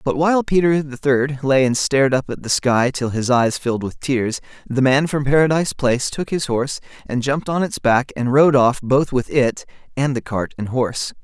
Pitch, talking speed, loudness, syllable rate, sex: 135 Hz, 225 wpm, -18 LUFS, 5.2 syllables/s, male